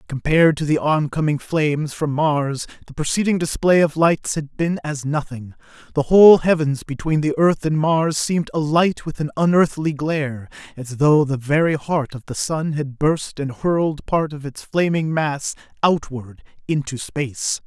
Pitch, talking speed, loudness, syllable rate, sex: 150 Hz, 170 wpm, -19 LUFS, 4.6 syllables/s, male